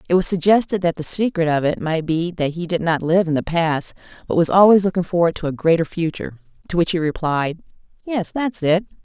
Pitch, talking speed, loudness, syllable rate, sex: 170 Hz, 225 wpm, -19 LUFS, 5.8 syllables/s, female